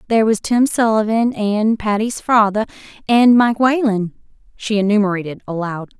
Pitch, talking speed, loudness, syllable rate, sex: 215 Hz, 130 wpm, -16 LUFS, 4.9 syllables/s, female